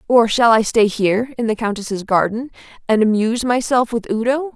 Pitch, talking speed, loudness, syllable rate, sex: 230 Hz, 185 wpm, -17 LUFS, 5.4 syllables/s, female